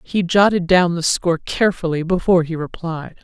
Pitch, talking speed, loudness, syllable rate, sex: 175 Hz, 165 wpm, -18 LUFS, 5.5 syllables/s, female